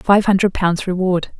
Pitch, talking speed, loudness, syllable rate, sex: 185 Hz, 170 wpm, -17 LUFS, 4.6 syllables/s, female